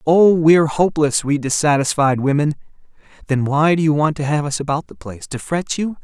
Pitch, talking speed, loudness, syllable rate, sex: 150 Hz, 200 wpm, -17 LUFS, 5.6 syllables/s, male